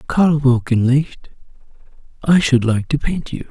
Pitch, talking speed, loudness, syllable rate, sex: 135 Hz, 135 wpm, -16 LUFS, 4.2 syllables/s, male